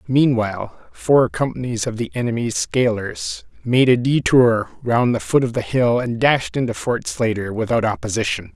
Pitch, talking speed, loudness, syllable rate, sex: 120 Hz, 160 wpm, -19 LUFS, 4.6 syllables/s, male